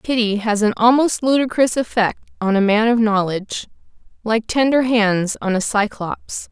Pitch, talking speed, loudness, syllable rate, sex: 220 Hz, 155 wpm, -18 LUFS, 4.7 syllables/s, female